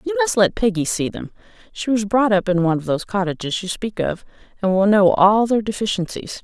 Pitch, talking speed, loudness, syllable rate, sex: 195 Hz, 225 wpm, -19 LUFS, 5.8 syllables/s, female